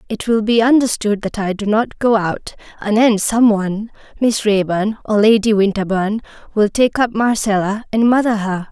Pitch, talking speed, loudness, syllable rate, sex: 215 Hz, 160 wpm, -16 LUFS, 5.0 syllables/s, female